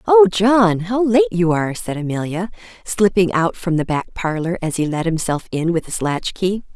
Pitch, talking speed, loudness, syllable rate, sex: 180 Hz, 205 wpm, -18 LUFS, 4.9 syllables/s, female